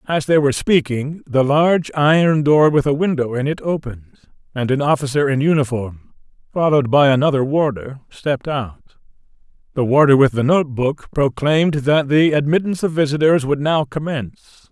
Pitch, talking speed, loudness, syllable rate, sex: 145 Hz, 160 wpm, -17 LUFS, 5.5 syllables/s, male